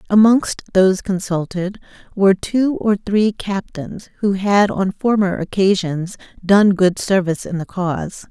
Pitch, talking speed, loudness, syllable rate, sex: 195 Hz, 135 wpm, -17 LUFS, 4.4 syllables/s, female